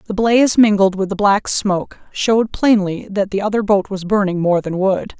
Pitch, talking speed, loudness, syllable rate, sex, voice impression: 200 Hz, 210 wpm, -16 LUFS, 5.2 syllables/s, female, feminine, adult-like, tensed, powerful, slightly muffled, fluent, intellectual, elegant, lively, slightly sharp